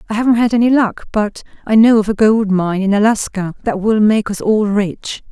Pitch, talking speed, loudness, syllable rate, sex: 210 Hz, 225 wpm, -14 LUFS, 5.1 syllables/s, female